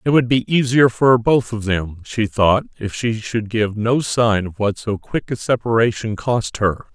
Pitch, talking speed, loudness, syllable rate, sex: 115 Hz, 205 wpm, -18 LUFS, 4.2 syllables/s, male